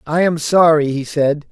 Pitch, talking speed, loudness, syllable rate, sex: 155 Hz, 200 wpm, -15 LUFS, 4.4 syllables/s, male